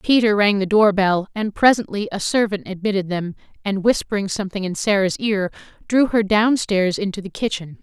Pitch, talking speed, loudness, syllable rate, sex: 200 Hz, 175 wpm, -19 LUFS, 5.3 syllables/s, female